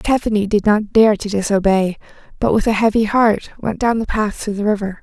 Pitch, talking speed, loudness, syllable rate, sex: 210 Hz, 215 wpm, -17 LUFS, 5.3 syllables/s, female